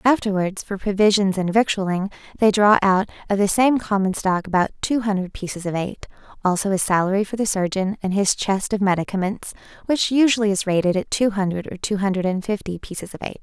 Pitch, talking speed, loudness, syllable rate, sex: 200 Hz, 200 wpm, -21 LUFS, 5.8 syllables/s, female